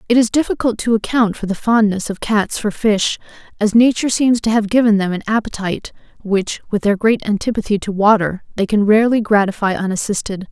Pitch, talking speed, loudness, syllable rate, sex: 210 Hz, 190 wpm, -16 LUFS, 5.7 syllables/s, female